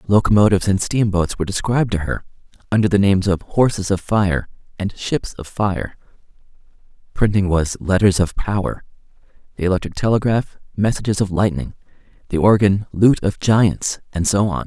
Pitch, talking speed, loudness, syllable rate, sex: 100 Hz, 150 wpm, -18 LUFS, 5.4 syllables/s, male